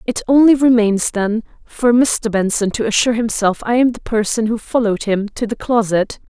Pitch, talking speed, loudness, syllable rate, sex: 225 Hz, 190 wpm, -16 LUFS, 5.2 syllables/s, female